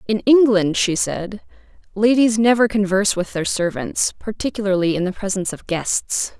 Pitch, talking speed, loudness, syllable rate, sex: 205 Hz, 150 wpm, -18 LUFS, 5.0 syllables/s, female